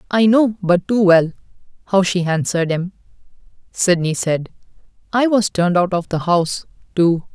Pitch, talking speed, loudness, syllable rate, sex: 185 Hz, 155 wpm, -17 LUFS, 5.0 syllables/s, male